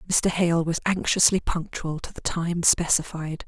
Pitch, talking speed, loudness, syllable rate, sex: 170 Hz, 155 wpm, -23 LUFS, 4.3 syllables/s, female